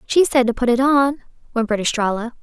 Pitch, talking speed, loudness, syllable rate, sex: 245 Hz, 200 wpm, -18 LUFS, 6.3 syllables/s, female